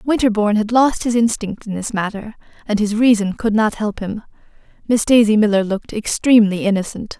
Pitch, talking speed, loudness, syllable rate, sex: 215 Hz, 175 wpm, -17 LUFS, 5.7 syllables/s, female